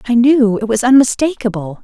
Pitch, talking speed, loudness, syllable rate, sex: 235 Hz, 165 wpm, -13 LUFS, 5.4 syllables/s, female